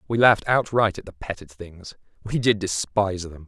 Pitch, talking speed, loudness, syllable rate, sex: 100 Hz, 190 wpm, -22 LUFS, 5.3 syllables/s, male